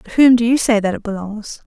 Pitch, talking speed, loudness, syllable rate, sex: 220 Hz, 280 wpm, -15 LUFS, 5.6 syllables/s, female